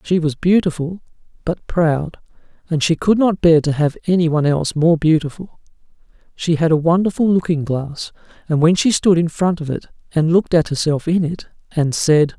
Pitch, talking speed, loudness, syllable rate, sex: 165 Hz, 190 wpm, -17 LUFS, 5.3 syllables/s, male